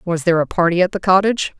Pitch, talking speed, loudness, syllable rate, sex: 180 Hz, 265 wpm, -16 LUFS, 7.5 syllables/s, female